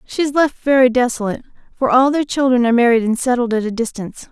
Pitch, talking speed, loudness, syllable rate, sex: 245 Hz, 225 wpm, -16 LUFS, 6.6 syllables/s, female